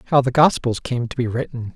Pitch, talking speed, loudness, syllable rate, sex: 125 Hz, 240 wpm, -20 LUFS, 6.0 syllables/s, male